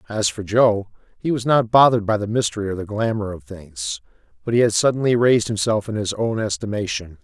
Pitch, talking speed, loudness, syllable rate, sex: 110 Hz, 205 wpm, -20 LUFS, 5.9 syllables/s, male